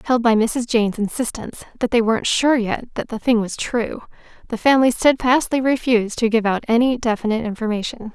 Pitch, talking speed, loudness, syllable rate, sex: 230 Hz, 185 wpm, -19 LUFS, 5.9 syllables/s, female